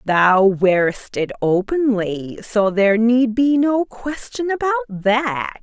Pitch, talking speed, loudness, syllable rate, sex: 230 Hz, 130 wpm, -18 LUFS, 3.7 syllables/s, female